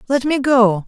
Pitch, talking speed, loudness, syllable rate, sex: 250 Hz, 205 wpm, -15 LUFS, 4.4 syllables/s, female